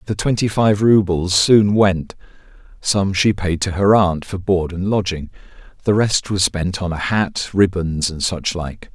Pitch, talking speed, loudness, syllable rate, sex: 95 Hz, 180 wpm, -17 LUFS, 4.1 syllables/s, male